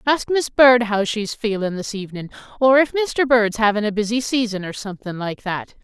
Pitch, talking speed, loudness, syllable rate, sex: 225 Hz, 205 wpm, -19 LUFS, 5.1 syllables/s, female